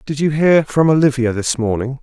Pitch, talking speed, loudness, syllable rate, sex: 135 Hz, 205 wpm, -15 LUFS, 5.2 syllables/s, male